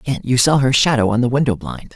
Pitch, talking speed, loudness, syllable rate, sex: 125 Hz, 275 wpm, -16 LUFS, 6.4 syllables/s, male